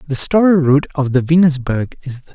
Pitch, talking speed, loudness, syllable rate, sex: 145 Hz, 205 wpm, -14 LUFS, 5.5 syllables/s, male